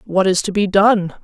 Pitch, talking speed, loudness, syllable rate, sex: 195 Hz, 245 wpm, -15 LUFS, 4.7 syllables/s, female